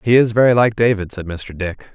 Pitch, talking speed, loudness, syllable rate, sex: 105 Hz, 245 wpm, -16 LUFS, 6.1 syllables/s, male